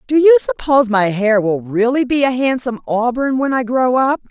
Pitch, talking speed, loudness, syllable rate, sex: 245 Hz, 210 wpm, -15 LUFS, 5.3 syllables/s, female